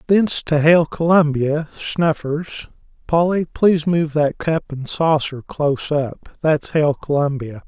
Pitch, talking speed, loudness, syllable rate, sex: 155 Hz, 125 wpm, -18 LUFS, 4.1 syllables/s, male